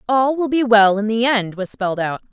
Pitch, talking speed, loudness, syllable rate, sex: 225 Hz, 260 wpm, -17 LUFS, 5.3 syllables/s, female